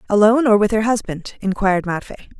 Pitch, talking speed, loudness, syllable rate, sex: 210 Hz, 175 wpm, -17 LUFS, 6.8 syllables/s, female